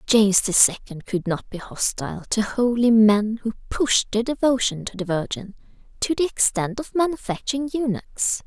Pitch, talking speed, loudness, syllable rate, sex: 225 Hz, 165 wpm, -21 LUFS, 4.9 syllables/s, female